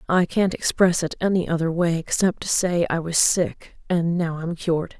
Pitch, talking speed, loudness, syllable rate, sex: 170 Hz, 205 wpm, -22 LUFS, 4.9 syllables/s, female